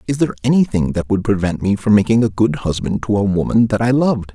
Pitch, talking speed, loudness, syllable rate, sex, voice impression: 110 Hz, 250 wpm, -16 LUFS, 6.4 syllables/s, male, masculine, slightly old, powerful, slightly soft, slightly muffled, slightly halting, sincere, mature, friendly, wild, kind, modest